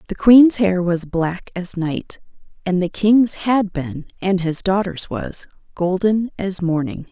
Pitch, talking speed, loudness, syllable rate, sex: 190 Hz, 160 wpm, -18 LUFS, 3.7 syllables/s, female